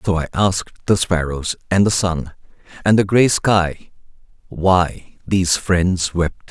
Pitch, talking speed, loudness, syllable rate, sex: 90 Hz, 150 wpm, -18 LUFS, 3.9 syllables/s, male